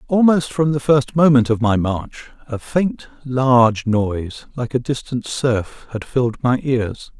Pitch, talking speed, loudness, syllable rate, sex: 125 Hz, 165 wpm, -18 LUFS, 3.9 syllables/s, male